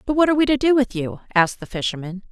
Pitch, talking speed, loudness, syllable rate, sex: 235 Hz, 285 wpm, -20 LUFS, 7.4 syllables/s, female